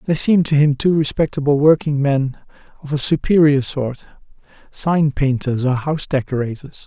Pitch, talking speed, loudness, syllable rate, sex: 145 Hz, 140 wpm, -17 LUFS, 5.2 syllables/s, male